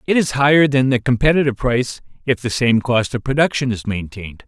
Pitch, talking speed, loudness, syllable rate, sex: 125 Hz, 200 wpm, -17 LUFS, 6.1 syllables/s, male